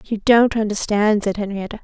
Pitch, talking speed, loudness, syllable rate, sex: 210 Hz, 165 wpm, -18 LUFS, 5.2 syllables/s, female